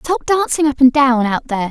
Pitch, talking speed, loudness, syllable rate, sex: 270 Hz, 245 wpm, -14 LUFS, 5.8 syllables/s, female